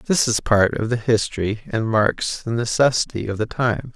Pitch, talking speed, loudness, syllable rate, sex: 115 Hz, 195 wpm, -20 LUFS, 5.0 syllables/s, male